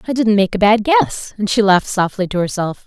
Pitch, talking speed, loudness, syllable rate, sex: 210 Hz, 250 wpm, -15 LUFS, 5.6 syllables/s, female